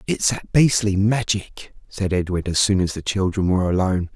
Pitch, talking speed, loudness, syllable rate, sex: 95 Hz, 190 wpm, -20 LUFS, 5.3 syllables/s, male